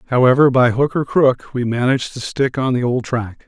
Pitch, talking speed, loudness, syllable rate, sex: 125 Hz, 225 wpm, -17 LUFS, 5.2 syllables/s, male